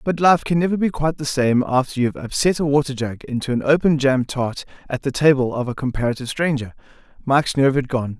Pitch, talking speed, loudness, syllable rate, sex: 135 Hz, 225 wpm, -20 LUFS, 6.3 syllables/s, male